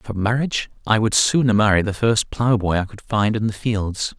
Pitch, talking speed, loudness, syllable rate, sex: 110 Hz, 230 wpm, -19 LUFS, 5.5 syllables/s, male